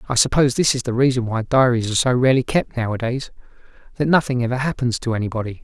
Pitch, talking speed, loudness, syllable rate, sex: 125 Hz, 190 wpm, -19 LUFS, 7.1 syllables/s, male